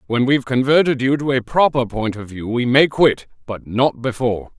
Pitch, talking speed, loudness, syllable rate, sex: 125 Hz, 210 wpm, -17 LUFS, 5.3 syllables/s, male